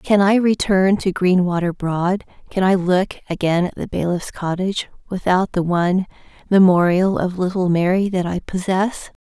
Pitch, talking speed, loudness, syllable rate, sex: 185 Hz, 155 wpm, -18 LUFS, 4.7 syllables/s, female